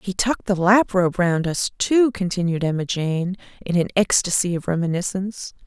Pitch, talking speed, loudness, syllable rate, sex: 185 Hz, 170 wpm, -21 LUFS, 5.2 syllables/s, female